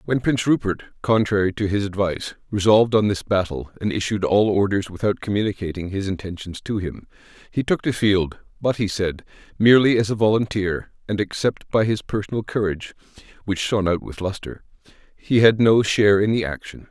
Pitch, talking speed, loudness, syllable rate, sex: 100 Hz, 175 wpm, -21 LUFS, 5.7 syllables/s, male